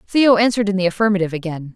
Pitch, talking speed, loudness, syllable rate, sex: 200 Hz, 205 wpm, -17 LUFS, 8.2 syllables/s, female